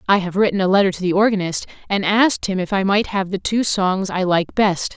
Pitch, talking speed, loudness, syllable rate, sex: 195 Hz, 255 wpm, -18 LUFS, 5.7 syllables/s, female